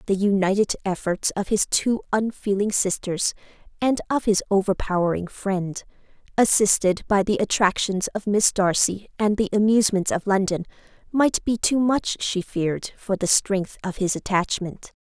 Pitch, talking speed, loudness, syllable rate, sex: 200 Hz, 150 wpm, -22 LUFS, 4.6 syllables/s, female